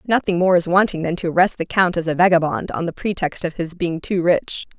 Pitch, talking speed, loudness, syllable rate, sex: 175 Hz, 250 wpm, -19 LUFS, 5.8 syllables/s, female